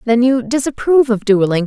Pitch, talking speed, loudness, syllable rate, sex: 240 Hz, 180 wpm, -14 LUFS, 5.7 syllables/s, female